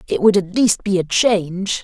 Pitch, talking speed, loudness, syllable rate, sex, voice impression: 195 Hz, 230 wpm, -17 LUFS, 4.8 syllables/s, male, masculine, very adult-like, muffled, unique, slightly kind